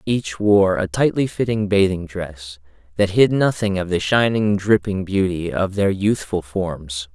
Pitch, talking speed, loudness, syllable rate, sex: 95 Hz, 160 wpm, -19 LUFS, 4.1 syllables/s, male